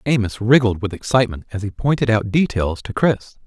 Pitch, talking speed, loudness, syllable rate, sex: 110 Hz, 190 wpm, -19 LUFS, 5.7 syllables/s, male